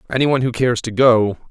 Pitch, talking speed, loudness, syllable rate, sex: 120 Hz, 240 wpm, -16 LUFS, 7.6 syllables/s, male